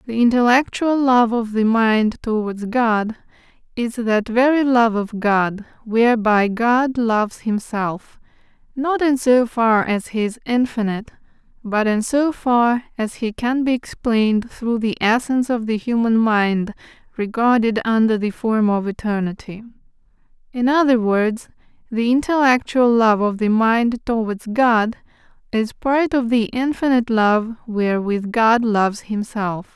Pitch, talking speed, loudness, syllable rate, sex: 230 Hz, 140 wpm, -18 LUFS, 4.2 syllables/s, female